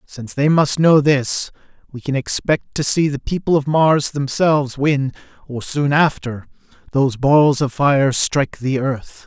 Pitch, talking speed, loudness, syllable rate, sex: 140 Hz, 170 wpm, -17 LUFS, 4.3 syllables/s, male